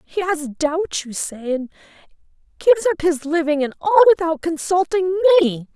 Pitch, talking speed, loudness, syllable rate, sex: 330 Hz, 155 wpm, -18 LUFS, 5.4 syllables/s, female